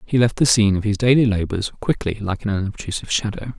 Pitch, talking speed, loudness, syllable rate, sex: 105 Hz, 220 wpm, -20 LUFS, 6.7 syllables/s, male